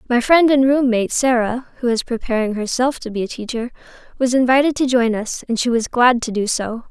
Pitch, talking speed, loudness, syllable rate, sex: 245 Hz, 225 wpm, -18 LUFS, 5.4 syllables/s, female